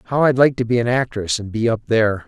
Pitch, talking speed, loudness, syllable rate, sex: 115 Hz, 315 wpm, -18 LUFS, 6.6 syllables/s, male